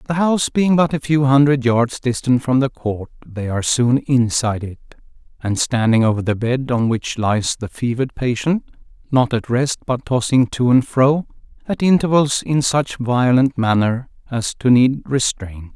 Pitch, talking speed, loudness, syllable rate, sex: 125 Hz, 170 wpm, -17 LUFS, 4.6 syllables/s, male